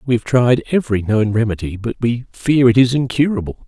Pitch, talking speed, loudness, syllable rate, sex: 120 Hz, 195 wpm, -16 LUFS, 5.6 syllables/s, male